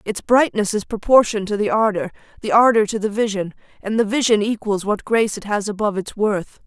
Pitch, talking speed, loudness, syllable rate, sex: 210 Hz, 205 wpm, -19 LUFS, 5.9 syllables/s, female